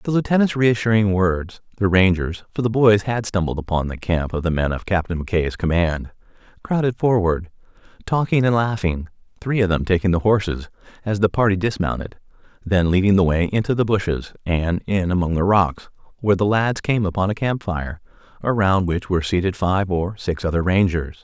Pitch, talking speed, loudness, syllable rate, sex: 95 Hz, 180 wpm, -20 LUFS, 5.5 syllables/s, male